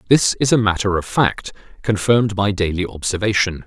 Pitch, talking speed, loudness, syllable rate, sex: 100 Hz, 165 wpm, -18 LUFS, 5.5 syllables/s, male